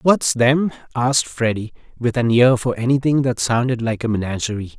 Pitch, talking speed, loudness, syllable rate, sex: 120 Hz, 175 wpm, -18 LUFS, 5.3 syllables/s, male